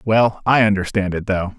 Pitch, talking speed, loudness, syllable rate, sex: 100 Hz, 190 wpm, -18 LUFS, 4.9 syllables/s, male